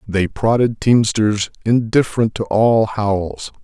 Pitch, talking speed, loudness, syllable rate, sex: 110 Hz, 115 wpm, -17 LUFS, 3.7 syllables/s, male